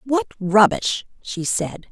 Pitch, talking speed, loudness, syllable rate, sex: 220 Hz, 125 wpm, -20 LUFS, 3.3 syllables/s, female